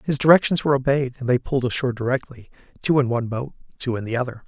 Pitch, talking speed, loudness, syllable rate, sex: 130 Hz, 230 wpm, -21 LUFS, 7.5 syllables/s, male